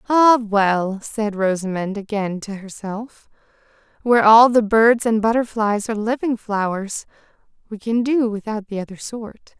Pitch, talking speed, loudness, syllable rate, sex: 220 Hz, 145 wpm, -19 LUFS, 4.4 syllables/s, female